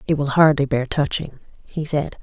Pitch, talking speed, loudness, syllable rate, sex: 145 Hz, 190 wpm, -20 LUFS, 4.8 syllables/s, female